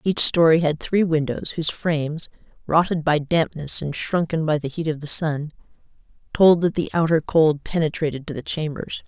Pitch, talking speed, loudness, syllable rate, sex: 160 Hz, 180 wpm, -21 LUFS, 5.1 syllables/s, female